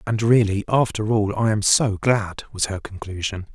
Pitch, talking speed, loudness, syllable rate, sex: 105 Hz, 185 wpm, -21 LUFS, 4.6 syllables/s, male